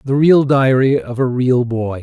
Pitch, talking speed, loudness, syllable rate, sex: 130 Hz, 205 wpm, -14 LUFS, 4.2 syllables/s, male